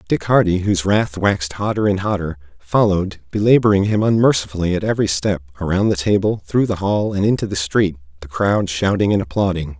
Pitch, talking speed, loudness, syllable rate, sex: 95 Hz, 185 wpm, -18 LUFS, 5.9 syllables/s, male